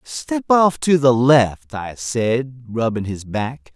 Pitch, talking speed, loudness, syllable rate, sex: 125 Hz, 160 wpm, -18 LUFS, 3.1 syllables/s, male